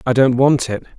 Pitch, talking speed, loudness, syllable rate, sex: 125 Hz, 245 wpm, -15 LUFS, 5.2 syllables/s, male